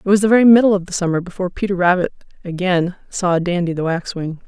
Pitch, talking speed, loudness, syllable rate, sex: 185 Hz, 215 wpm, -17 LUFS, 6.5 syllables/s, female